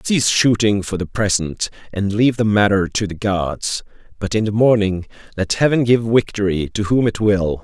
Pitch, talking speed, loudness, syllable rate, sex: 105 Hz, 190 wpm, -18 LUFS, 5.0 syllables/s, male